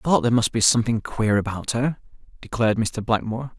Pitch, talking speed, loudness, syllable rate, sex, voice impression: 115 Hz, 200 wpm, -22 LUFS, 6.4 syllables/s, male, masculine, slightly young, slightly adult-like, slightly thick, slightly tensed, slightly weak, slightly bright, hard, clear, fluent, cool, slightly intellectual, very refreshing, sincere, calm, slightly friendly, slightly reassuring, slightly unique, wild, slightly lively, kind, slightly intense